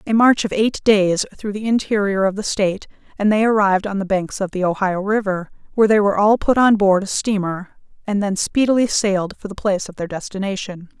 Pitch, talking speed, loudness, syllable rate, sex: 200 Hz, 220 wpm, -18 LUFS, 5.8 syllables/s, female